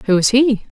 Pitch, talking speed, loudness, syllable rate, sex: 230 Hz, 225 wpm, -15 LUFS, 4.6 syllables/s, female